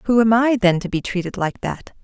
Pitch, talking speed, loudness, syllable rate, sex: 210 Hz, 265 wpm, -19 LUFS, 5.3 syllables/s, female